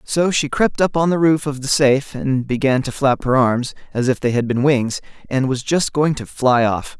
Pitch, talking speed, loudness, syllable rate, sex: 135 Hz, 250 wpm, -18 LUFS, 4.8 syllables/s, male